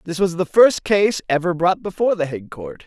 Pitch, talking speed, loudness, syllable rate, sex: 175 Hz, 230 wpm, -18 LUFS, 5.6 syllables/s, male